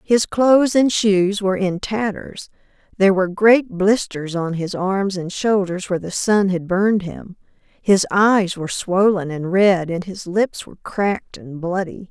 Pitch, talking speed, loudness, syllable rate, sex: 195 Hz, 175 wpm, -18 LUFS, 4.4 syllables/s, female